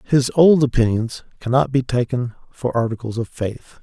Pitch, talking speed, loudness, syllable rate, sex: 125 Hz, 155 wpm, -19 LUFS, 4.8 syllables/s, male